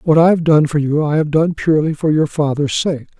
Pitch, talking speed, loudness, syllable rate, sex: 155 Hz, 265 wpm, -15 LUFS, 5.6 syllables/s, male